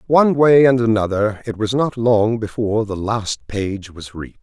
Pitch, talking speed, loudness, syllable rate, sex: 115 Hz, 190 wpm, -17 LUFS, 4.8 syllables/s, male